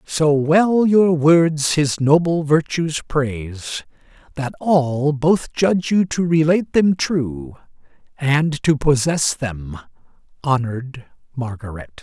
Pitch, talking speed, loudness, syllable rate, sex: 150 Hz, 115 wpm, -18 LUFS, 3.4 syllables/s, male